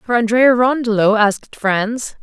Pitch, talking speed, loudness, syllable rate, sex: 225 Hz, 135 wpm, -15 LUFS, 4.2 syllables/s, female